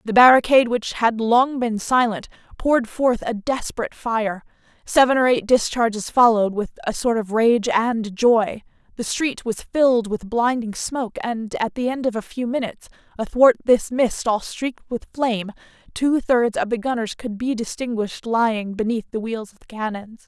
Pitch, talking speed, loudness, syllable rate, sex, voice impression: 230 Hz, 180 wpm, -20 LUFS, 4.9 syllables/s, female, feminine, adult-like, fluent, sincere, slightly calm, slightly elegant, slightly sweet